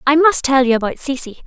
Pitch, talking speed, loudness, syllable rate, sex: 270 Hz, 245 wpm, -15 LUFS, 6.0 syllables/s, female